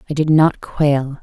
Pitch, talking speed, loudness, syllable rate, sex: 145 Hz, 195 wpm, -16 LUFS, 4.0 syllables/s, female